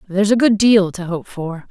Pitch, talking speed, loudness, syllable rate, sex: 195 Hz, 245 wpm, -16 LUFS, 5.2 syllables/s, female